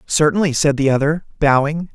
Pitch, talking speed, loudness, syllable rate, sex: 150 Hz, 155 wpm, -16 LUFS, 5.4 syllables/s, male